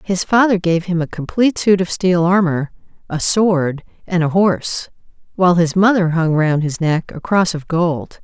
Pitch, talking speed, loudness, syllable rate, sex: 175 Hz, 190 wpm, -16 LUFS, 4.7 syllables/s, female